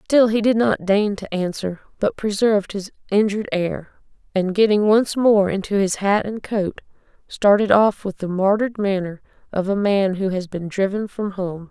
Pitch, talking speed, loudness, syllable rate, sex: 200 Hz, 185 wpm, -20 LUFS, 4.8 syllables/s, female